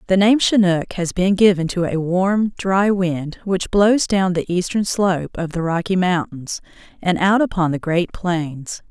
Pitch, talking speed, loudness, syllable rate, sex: 185 Hz, 180 wpm, -18 LUFS, 4.2 syllables/s, female